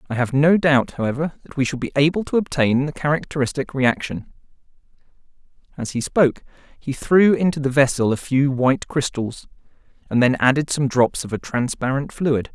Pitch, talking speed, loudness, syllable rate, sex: 140 Hz, 170 wpm, -20 LUFS, 5.4 syllables/s, male